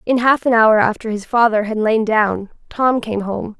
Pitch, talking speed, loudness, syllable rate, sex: 225 Hz, 215 wpm, -16 LUFS, 4.6 syllables/s, female